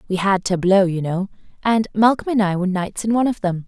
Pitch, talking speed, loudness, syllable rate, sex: 200 Hz, 245 wpm, -19 LUFS, 6.2 syllables/s, female